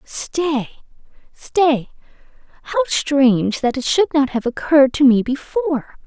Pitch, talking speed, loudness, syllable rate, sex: 260 Hz, 110 wpm, -17 LUFS, 4.3 syllables/s, female